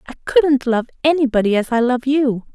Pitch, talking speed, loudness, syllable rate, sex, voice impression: 260 Hz, 190 wpm, -17 LUFS, 5.4 syllables/s, female, very feminine, adult-like, very thin, tensed, slightly powerful, bright, slightly hard, clear, fluent, slightly raspy, slightly cool, intellectual, refreshing, sincere, calm, slightly friendly, reassuring, very unique, slightly elegant, wild, lively, slightly strict, slightly intense, sharp